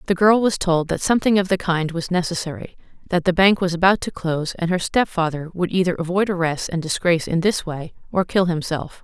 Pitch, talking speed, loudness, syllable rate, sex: 175 Hz, 220 wpm, -20 LUFS, 5.8 syllables/s, female